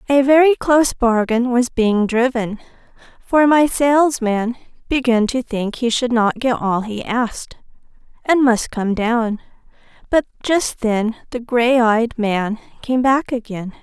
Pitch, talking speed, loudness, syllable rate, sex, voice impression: 240 Hz, 150 wpm, -17 LUFS, 4.1 syllables/s, female, very feminine, adult-like, slightly bright, slightly cute, slightly refreshing, friendly